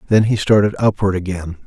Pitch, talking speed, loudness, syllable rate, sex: 100 Hz, 180 wpm, -17 LUFS, 5.8 syllables/s, male